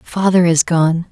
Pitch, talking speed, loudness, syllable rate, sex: 170 Hz, 160 wpm, -14 LUFS, 3.8 syllables/s, female